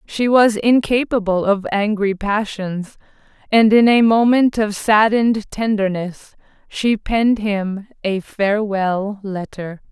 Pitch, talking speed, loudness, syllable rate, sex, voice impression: 210 Hz, 115 wpm, -17 LUFS, 3.8 syllables/s, female, feminine, adult-like, slightly intellectual, slightly calm